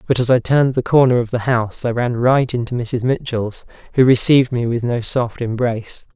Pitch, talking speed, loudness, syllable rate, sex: 120 Hz, 215 wpm, -17 LUFS, 5.5 syllables/s, male